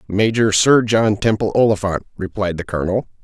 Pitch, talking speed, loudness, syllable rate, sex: 105 Hz, 150 wpm, -17 LUFS, 5.2 syllables/s, male